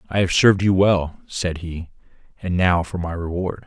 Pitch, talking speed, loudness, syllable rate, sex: 90 Hz, 195 wpm, -20 LUFS, 4.8 syllables/s, male